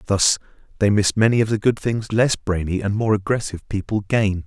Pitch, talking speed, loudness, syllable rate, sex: 105 Hz, 200 wpm, -20 LUFS, 5.5 syllables/s, male